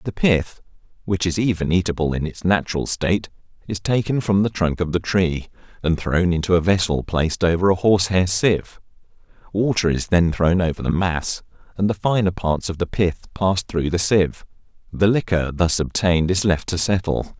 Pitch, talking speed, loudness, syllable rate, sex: 90 Hz, 190 wpm, -20 LUFS, 5.2 syllables/s, male